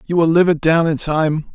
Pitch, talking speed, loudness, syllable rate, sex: 160 Hz, 270 wpm, -16 LUFS, 5.0 syllables/s, male